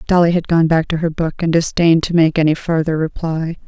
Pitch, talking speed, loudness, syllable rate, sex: 165 Hz, 230 wpm, -16 LUFS, 5.8 syllables/s, female